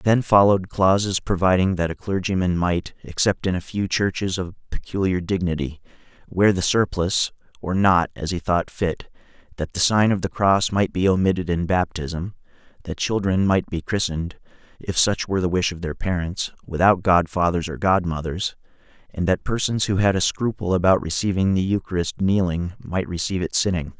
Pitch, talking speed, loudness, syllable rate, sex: 90 Hz, 175 wpm, -21 LUFS, 5.2 syllables/s, male